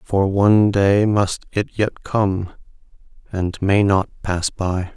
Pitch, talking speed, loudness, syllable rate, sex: 100 Hz, 145 wpm, -19 LUFS, 3.3 syllables/s, male